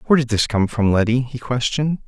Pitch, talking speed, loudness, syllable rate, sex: 120 Hz, 230 wpm, -19 LUFS, 6.5 syllables/s, male